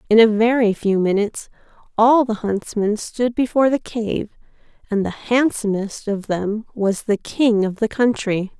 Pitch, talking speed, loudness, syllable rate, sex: 215 Hz, 160 wpm, -19 LUFS, 4.4 syllables/s, female